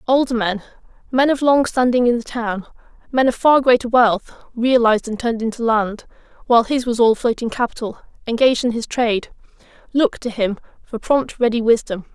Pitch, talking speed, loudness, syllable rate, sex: 235 Hz, 170 wpm, -18 LUFS, 5.6 syllables/s, female